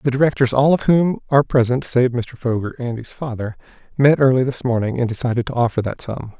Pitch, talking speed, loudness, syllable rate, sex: 125 Hz, 205 wpm, -18 LUFS, 5.9 syllables/s, male